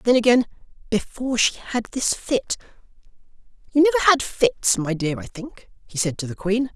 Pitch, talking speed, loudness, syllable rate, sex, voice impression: 235 Hz, 170 wpm, -21 LUFS, 5.4 syllables/s, male, feminine, adult-like, tensed, powerful, slightly muffled, slightly fluent, intellectual, slightly friendly, slightly unique, lively, intense, sharp